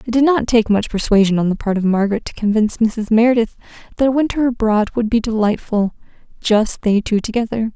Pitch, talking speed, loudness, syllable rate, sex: 220 Hz, 195 wpm, -17 LUFS, 6.0 syllables/s, female